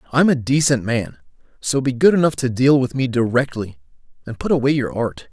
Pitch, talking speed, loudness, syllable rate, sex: 130 Hz, 205 wpm, -18 LUFS, 5.5 syllables/s, male